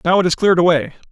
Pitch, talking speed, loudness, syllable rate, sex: 180 Hz, 270 wpm, -15 LUFS, 8.4 syllables/s, male